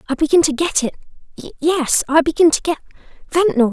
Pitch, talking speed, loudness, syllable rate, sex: 305 Hz, 130 wpm, -17 LUFS, 6.1 syllables/s, female